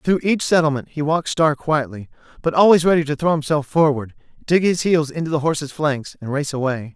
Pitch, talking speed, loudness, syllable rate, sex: 150 Hz, 205 wpm, -19 LUFS, 5.7 syllables/s, male